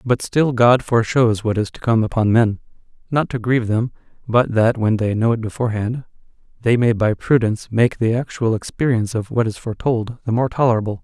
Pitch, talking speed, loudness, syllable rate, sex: 115 Hz, 195 wpm, -18 LUFS, 5.8 syllables/s, male